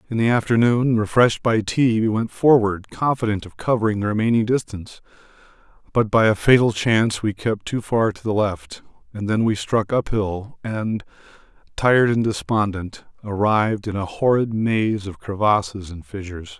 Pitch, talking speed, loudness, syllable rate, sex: 110 Hz, 165 wpm, -20 LUFS, 5.0 syllables/s, male